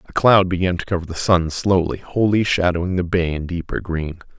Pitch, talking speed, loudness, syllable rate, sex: 90 Hz, 205 wpm, -19 LUFS, 5.4 syllables/s, male